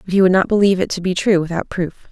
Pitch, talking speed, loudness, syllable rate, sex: 185 Hz, 315 wpm, -17 LUFS, 7.0 syllables/s, female